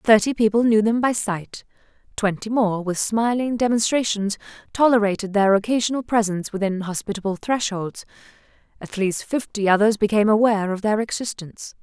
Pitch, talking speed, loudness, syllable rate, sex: 215 Hz, 135 wpm, -21 LUFS, 5.6 syllables/s, female